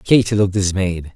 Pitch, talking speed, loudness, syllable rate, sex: 95 Hz, 155 wpm, -17 LUFS, 5.4 syllables/s, male